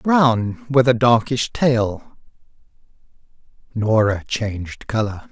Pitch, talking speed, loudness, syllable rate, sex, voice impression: 120 Hz, 90 wpm, -19 LUFS, 3.3 syllables/s, male, masculine, adult-like, tensed, powerful, bright, clear, cool, intellectual, calm, friendly, wild, lively, kind